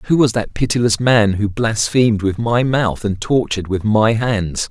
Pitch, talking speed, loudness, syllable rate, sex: 110 Hz, 190 wpm, -16 LUFS, 4.5 syllables/s, male